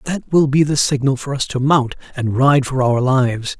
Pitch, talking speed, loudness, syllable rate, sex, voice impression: 135 Hz, 235 wpm, -16 LUFS, 5.1 syllables/s, male, very masculine, middle-aged, thick, tensed, slightly powerful, bright, slightly soft, clear, fluent, cool, very intellectual, refreshing, sincere, calm, mature, very friendly, very reassuring, unique, slightly elegant, wild, sweet, lively, kind, slightly intense